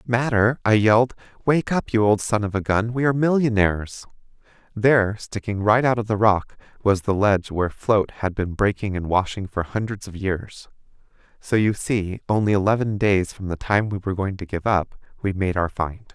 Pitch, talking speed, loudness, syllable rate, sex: 105 Hz, 200 wpm, -21 LUFS, 5.2 syllables/s, male